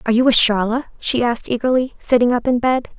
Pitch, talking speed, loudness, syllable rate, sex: 240 Hz, 200 wpm, -17 LUFS, 6.4 syllables/s, female